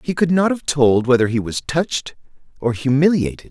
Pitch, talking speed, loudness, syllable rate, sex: 140 Hz, 190 wpm, -18 LUFS, 5.3 syllables/s, male